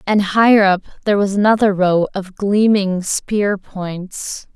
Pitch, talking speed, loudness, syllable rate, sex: 200 Hz, 145 wpm, -16 LUFS, 4.0 syllables/s, female